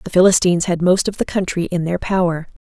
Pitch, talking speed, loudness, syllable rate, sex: 180 Hz, 230 wpm, -17 LUFS, 6.3 syllables/s, female